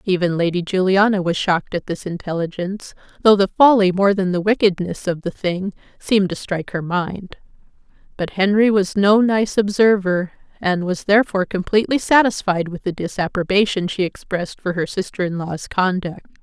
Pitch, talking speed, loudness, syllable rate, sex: 190 Hz, 165 wpm, -18 LUFS, 5.4 syllables/s, female